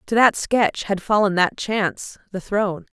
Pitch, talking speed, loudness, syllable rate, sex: 200 Hz, 180 wpm, -20 LUFS, 4.6 syllables/s, female